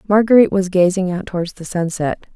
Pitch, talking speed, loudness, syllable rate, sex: 185 Hz, 180 wpm, -17 LUFS, 6.2 syllables/s, female